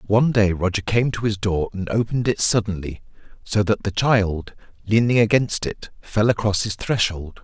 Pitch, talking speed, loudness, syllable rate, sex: 105 Hz, 175 wpm, -21 LUFS, 4.9 syllables/s, male